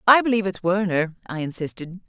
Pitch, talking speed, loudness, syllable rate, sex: 190 Hz, 175 wpm, -22 LUFS, 6.2 syllables/s, female